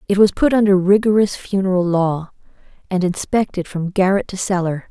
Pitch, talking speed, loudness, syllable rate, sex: 190 Hz, 160 wpm, -17 LUFS, 5.3 syllables/s, female